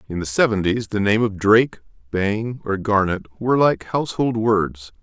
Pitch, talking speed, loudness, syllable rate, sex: 105 Hz, 165 wpm, -20 LUFS, 4.8 syllables/s, male